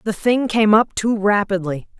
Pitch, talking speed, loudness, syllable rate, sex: 210 Hz, 180 wpm, -18 LUFS, 4.5 syllables/s, female